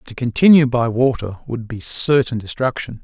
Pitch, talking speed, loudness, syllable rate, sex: 120 Hz, 160 wpm, -17 LUFS, 4.9 syllables/s, male